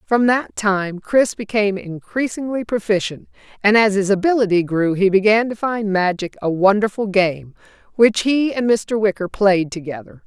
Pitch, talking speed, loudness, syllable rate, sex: 205 Hz, 160 wpm, -18 LUFS, 4.7 syllables/s, female